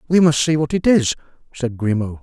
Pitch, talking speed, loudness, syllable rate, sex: 140 Hz, 215 wpm, -18 LUFS, 5.6 syllables/s, male